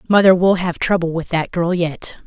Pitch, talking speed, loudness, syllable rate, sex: 175 Hz, 210 wpm, -17 LUFS, 5.0 syllables/s, female